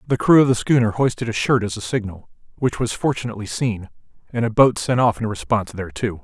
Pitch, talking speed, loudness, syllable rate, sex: 115 Hz, 220 wpm, -20 LUFS, 6.4 syllables/s, male